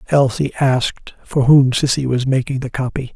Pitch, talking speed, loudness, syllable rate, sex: 135 Hz, 170 wpm, -17 LUFS, 5.0 syllables/s, male